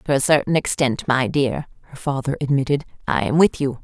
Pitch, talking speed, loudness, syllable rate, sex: 135 Hz, 205 wpm, -20 LUFS, 5.4 syllables/s, female